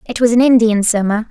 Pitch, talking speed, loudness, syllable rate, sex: 225 Hz, 185 wpm, -13 LUFS, 5.3 syllables/s, female